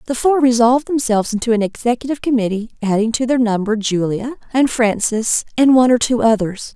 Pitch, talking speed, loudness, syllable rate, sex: 235 Hz, 180 wpm, -16 LUFS, 6.0 syllables/s, female